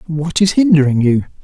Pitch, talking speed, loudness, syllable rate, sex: 155 Hz, 165 wpm, -13 LUFS, 5.3 syllables/s, male